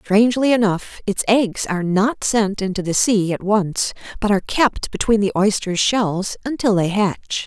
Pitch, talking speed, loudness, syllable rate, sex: 205 Hz, 175 wpm, -19 LUFS, 4.6 syllables/s, female